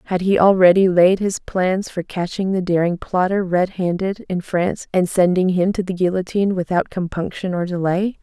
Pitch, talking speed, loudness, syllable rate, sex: 185 Hz, 180 wpm, -18 LUFS, 5.0 syllables/s, female